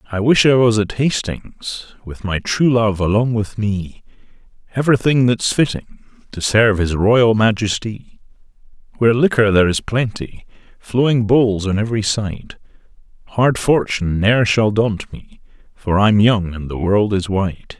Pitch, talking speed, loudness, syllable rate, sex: 110 Hz, 150 wpm, -16 LUFS, 4.5 syllables/s, male